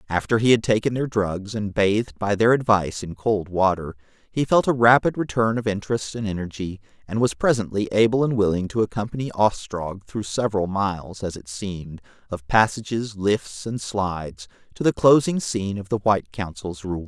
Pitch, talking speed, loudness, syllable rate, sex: 105 Hz, 185 wpm, -22 LUFS, 5.2 syllables/s, male